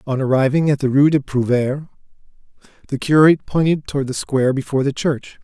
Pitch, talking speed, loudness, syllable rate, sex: 140 Hz, 175 wpm, -17 LUFS, 6.3 syllables/s, male